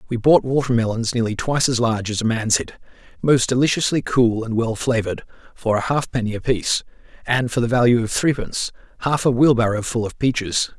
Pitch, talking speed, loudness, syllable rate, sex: 120 Hz, 185 wpm, -20 LUFS, 5.9 syllables/s, male